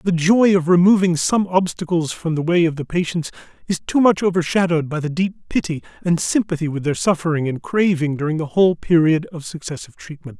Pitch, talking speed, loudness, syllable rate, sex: 170 Hz, 195 wpm, -18 LUFS, 5.9 syllables/s, male